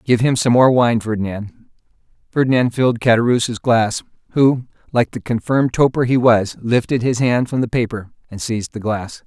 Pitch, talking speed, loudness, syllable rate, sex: 120 Hz, 175 wpm, -17 LUFS, 5.1 syllables/s, male